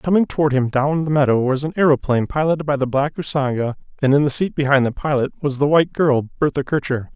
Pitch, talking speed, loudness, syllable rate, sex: 140 Hz, 225 wpm, -18 LUFS, 6.3 syllables/s, male